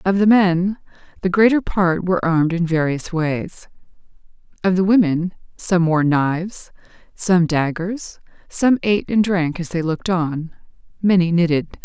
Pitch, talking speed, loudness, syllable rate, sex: 175 Hz, 145 wpm, -18 LUFS, 4.4 syllables/s, female